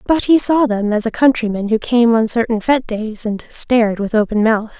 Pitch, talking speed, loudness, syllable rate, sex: 230 Hz, 225 wpm, -15 LUFS, 5.2 syllables/s, female